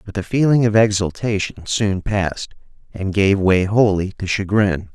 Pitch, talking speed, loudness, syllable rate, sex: 100 Hz, 160 wpm, -18 LUFS, 4.6 syllables/s, male